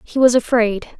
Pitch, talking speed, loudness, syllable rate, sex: 230 Hz, 180 wpm, -16 LUFS, 4.5 syllables/s, female